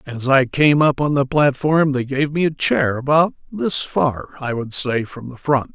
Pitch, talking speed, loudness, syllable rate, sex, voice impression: 140 Hz, 220 wpm, -18 LUFS, 4.2 syllables/s, male, very masculine, very adult-like, old, very thick, tensed, powerful, bright, hard, muffled, fluent, raspy, very cool, intellectual, sincere, calm, very mature, slightly friendly, slightly reassuring, slightly unique, very wild, slightly lively, strict, slightly sharp